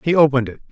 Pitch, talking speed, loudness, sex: 140 Hz, 255 wpm, -17 LUFS, male